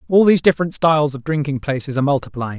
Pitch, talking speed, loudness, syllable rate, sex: 145 Hz, 210 wpm, -18 LUFS, 7.3 syllables/s, male